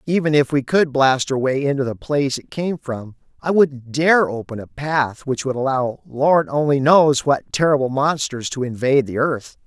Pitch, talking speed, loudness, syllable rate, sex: 140 Hz, 200 wpm, -19 LUFS, 4.7 syllables/s, male